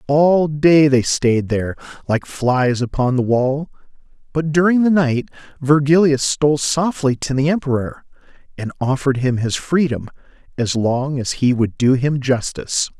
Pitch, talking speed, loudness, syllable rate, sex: 140 Hz, 150 wpm, -17 LUFS, 4.5 syllables/s, male